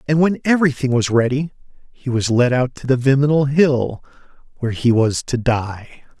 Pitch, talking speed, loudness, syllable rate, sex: 130 Hz, 175 wpm, -17 LUFS, 5.1 syllables/s, male